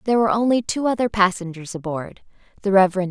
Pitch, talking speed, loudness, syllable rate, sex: 200 Hz, 175 wpm, -20 LUFS, 6.5 syllables/s, female